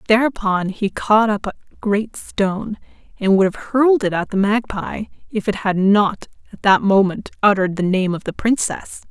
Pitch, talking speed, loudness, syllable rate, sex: 205 Hz, 185 wpm, -18 LUFS, 4.9 syllables/s, female